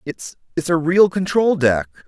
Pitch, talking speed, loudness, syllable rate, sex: 160 Hz, 145 wpm, -18 LUFS, 3.9 syllables/s, male